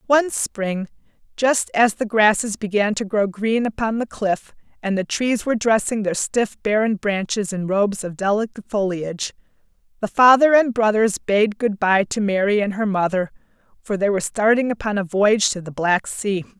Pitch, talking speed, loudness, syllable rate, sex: 210 Hz, 180 wpm, -20 LUFS, 5.0 syllables/s, female